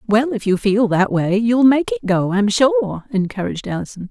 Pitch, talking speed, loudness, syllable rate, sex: 225 Hz, 205 wpm, -17 LUFS, 4.9 syllables/s, female